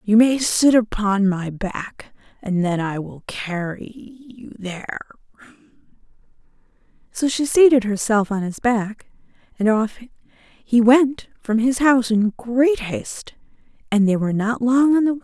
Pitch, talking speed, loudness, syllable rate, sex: 225 Hz, 150 wpm, -19 LUFS, 4.1 syllables/s, female